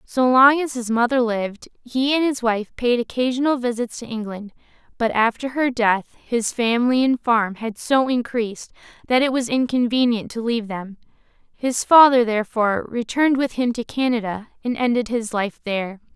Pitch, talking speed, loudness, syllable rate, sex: 240 Hz, 170 wpm, -20 LUFS, 5.1 syllables/s, female